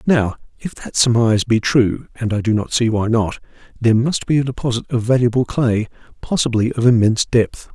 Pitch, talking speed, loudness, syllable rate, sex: 115 Hz, 170 wpm, -17 LUFS, 5.5 syllables/s, male